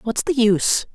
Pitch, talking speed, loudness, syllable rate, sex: 230 Hz, 190 wpm, -18 LUFS, 4.7 syllables/s, female